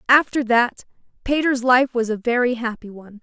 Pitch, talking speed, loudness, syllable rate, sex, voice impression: 240 Hz, 165 wpm, -19 LUFS, 5.3 syllables/s, female, slightly feminine, young, tensed, slightly clear, slightly cute, slightly refreshing, friendly, slightly lively